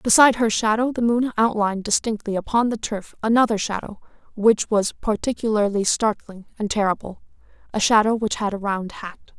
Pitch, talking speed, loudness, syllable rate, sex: 215 Hz, 160 wpm, -21 LUFS, 5.4 syllables/s, female